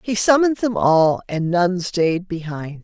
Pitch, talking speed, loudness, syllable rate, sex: 185 Hz, 170 wpm, -18 LUFS, 4.1 syllables/s, female